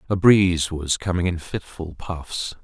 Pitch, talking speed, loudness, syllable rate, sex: 85 Hz, 160 wpm, -22 LUFS, 4.2 syllables/s, male